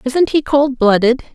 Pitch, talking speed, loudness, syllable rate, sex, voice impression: 260 Hz, 180 wpm, -14 LUFS, 4.4 syllables/s, female, very feminine, adult-like, slightly middle-aged, very thin, tensed, slightly powerful, very bright, slightly soft, very clear, fluent, slightly nasal, cute, intellectual, refreshing, sincere, calm, friendly, reassuring, very unique, elegant, sweet, slightly lively, kind, slightly intense, light